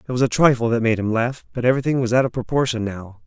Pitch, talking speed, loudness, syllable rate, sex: 120 Hz, 275 wpm, -20 LUFS, 6.7 syllables/s, male